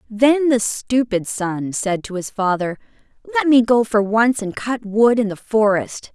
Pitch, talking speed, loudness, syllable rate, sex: 220 Hz, 185 wpm, -18 LUFS, 4.0 syllables/s, female